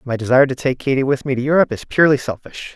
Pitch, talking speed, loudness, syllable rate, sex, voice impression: 135 Hz, 260 wpm, -17 LUFS, 7.6 syllables/s, male, masculine, young, slightly adult-like, slightly thick, slightly tensed, weak, slightly dark, soft, clear, fluent, slightly raspy, cool, slightly intellectual, very refreshing, very sincere, calm, friendly, reassuring, slightly unique, slightly elegant, slightly wild, slightly sweet, slightly lively, kind, very modest, slightly light